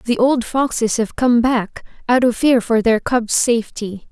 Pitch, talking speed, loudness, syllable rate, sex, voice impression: 235 Hz, 190 wpm, -17 LUFS, 4.2 syllables/s, female, feminine, slightly young, slightly clear, slightly cute, slightly refreshing, friendly